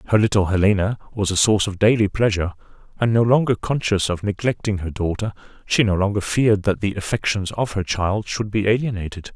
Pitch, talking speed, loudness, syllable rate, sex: 105 Hz, 190 wpm, -20 LUFS, 6.1 syllables/s, male